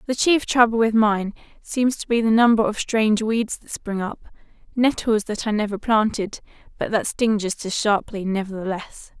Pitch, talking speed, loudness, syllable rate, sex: 220 Hz, 175 wpm, -21 LUFS, 4.9 syllables/s, female